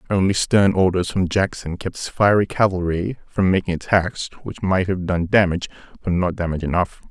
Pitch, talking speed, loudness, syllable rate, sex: 95 Hz, 175 wpm, -20 LUFS, 5.5 syllables/s, male